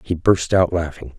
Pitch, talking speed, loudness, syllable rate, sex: 85 Hz, 205 wpm, -18 LUFS, 4.6 syllables/s, male